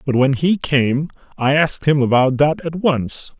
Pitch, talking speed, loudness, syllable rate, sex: 145 Hz, 195 wpm, -17 LUFS, 4.4 syllables/s, male